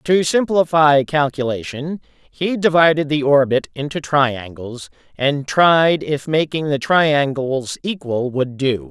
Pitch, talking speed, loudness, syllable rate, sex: 145 Hz, 120 wpm, -17 LUFS, 3.7 syllables/s, male